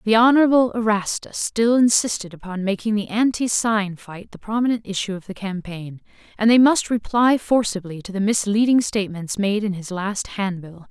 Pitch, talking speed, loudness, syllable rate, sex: 210 Hz, 175 wpm, -20 LUFS, 5.1 syllables/s, female